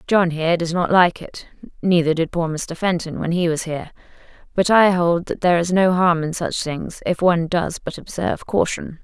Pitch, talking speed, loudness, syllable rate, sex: 170 Hz, 205 wpm, -19 LUFS, 5.1 syllables/s, female